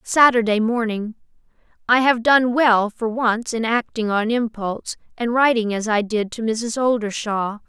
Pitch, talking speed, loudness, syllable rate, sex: 225 Hz, 150 wpm, -19 LUFS, 4.4 syllables/s, female